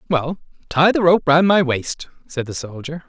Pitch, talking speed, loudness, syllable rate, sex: 155 Hz, 195 wpm, -18 LUFS, 4.7 syllables/s, male